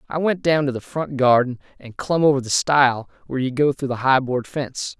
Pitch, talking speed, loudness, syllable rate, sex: 135 Hz, 240 wpm, -20 LUFS, 5.6 syllables/s, male